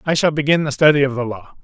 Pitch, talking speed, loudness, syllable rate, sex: 145 Hz, 295 wpm, -17 LUFS, 6.7 syllables/s, male